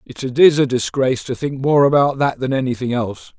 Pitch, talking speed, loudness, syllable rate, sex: 130 Hz, 215 wpm, -17 LUFS, 5.6 syllables/s, male